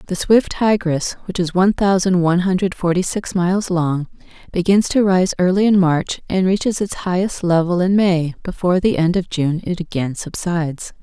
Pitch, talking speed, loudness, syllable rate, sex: 180 Hz, 185 wpm, -18 LUFS, 5.2 syllables/s, female